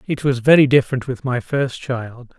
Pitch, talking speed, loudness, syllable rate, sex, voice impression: 130 Hz, 200 wpm, -18 LUFS, 4.9 syllables/s, male, masculine, middle-aged, relaxed, slightly weak, soft, slightly muffled, raspy, intellectual, calm, friendly, reassuring, slightly wild, kind, slightly modest